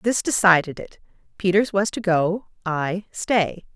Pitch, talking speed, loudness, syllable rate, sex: 190 Hz, 145 wpm, -21 LUFS, 4.0 syllables/s, female